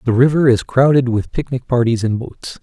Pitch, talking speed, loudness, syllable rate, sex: 125 Hz, 205 wpm, -16 LUFS, 5.2 syllables/s, male